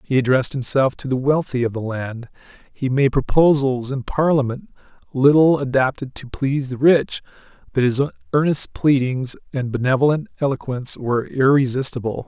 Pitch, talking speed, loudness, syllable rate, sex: 135 Hz, 140 wpm, -19 LUFS, 5.3 syllables/s, male